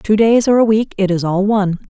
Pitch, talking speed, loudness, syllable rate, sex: 205 Hz, 285 wpm, -14 LUFS, 5.7 syllables/s, female